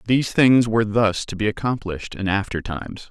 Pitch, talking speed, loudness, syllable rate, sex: 110 Hz, 195 wpm, -21 LUFS, 5.8 syllables/s, male